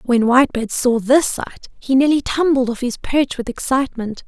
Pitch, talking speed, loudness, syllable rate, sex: 255 Hz, 185 wpm, -17 LUFS, 5.1 syllables/s, female